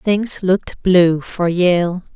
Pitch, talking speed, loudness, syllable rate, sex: 185 Hz, 140 wpm, -16 LUFS, 3.0 syllables/s, female